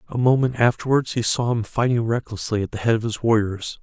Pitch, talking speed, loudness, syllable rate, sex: 115 Hz, 220 wpm, -21 LUFS, 5.8 syllables/s, male